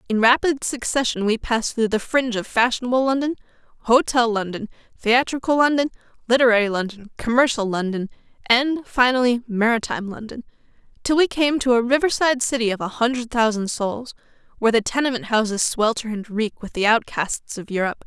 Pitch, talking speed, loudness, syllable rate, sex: 235 Hz, 155 wpm, -20 LUFS, 5.8 syllables/s, female